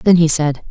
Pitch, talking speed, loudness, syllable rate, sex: 160 Hz, 255 wpm, -14 LUFS, 5.4 syllables/s, female